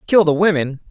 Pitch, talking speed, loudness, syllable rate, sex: 165 Hz, 200 wpm, -16 LUFS, 5.7 syllables/s, male